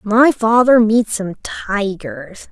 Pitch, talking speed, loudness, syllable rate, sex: 215 Hz, 120 wpm, -15 LUFS, 2.9 syllables/s, female